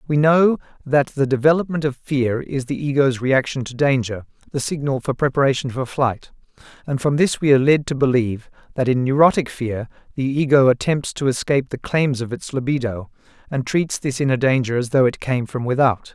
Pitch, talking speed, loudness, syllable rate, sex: 135 Hz, 195 wpm, -19 LUFS, 5.4 syllables/s, male